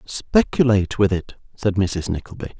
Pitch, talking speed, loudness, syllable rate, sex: 105 Hz, 140 wpm, -20 LUFS, 5.0 syllables/s, male